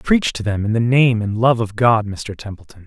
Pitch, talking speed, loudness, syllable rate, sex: 110 Hz, 250 wpm, -17 LUFS, 5.1 syllables/s, male